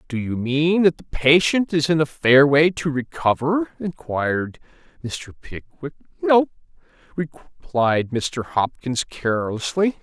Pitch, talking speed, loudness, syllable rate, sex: 145 Hz, 125 wpm, -20 LUFS, 3.8 syllables/s, male